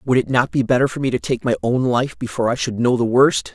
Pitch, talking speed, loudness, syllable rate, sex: 125 Hz, 305 wpm, -18 LUFS, 6.1 syllables/s, male